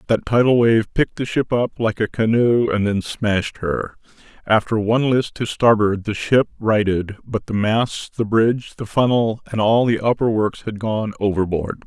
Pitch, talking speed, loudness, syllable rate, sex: 110 Hz, 185 wpm, -19 LUFS, 4.7 syllables/s, male